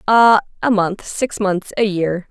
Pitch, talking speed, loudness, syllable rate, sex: 200 Hz, 130 wpm, -17 LUFS, 3.7 syllables/s, female